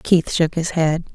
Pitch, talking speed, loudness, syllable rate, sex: 165 Hz, 210 wpm, -19 LUFS, 3.9 syllables/s, female